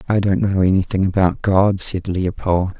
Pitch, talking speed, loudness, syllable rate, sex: 95 Hz, 170 wpm, -18 LUFS, 4.6 syllables/s, male